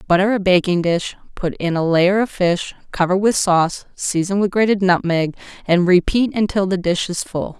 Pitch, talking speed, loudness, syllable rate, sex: 185 Hz, 190 wpm, -18 LUFS, 4.9 syllables/s, female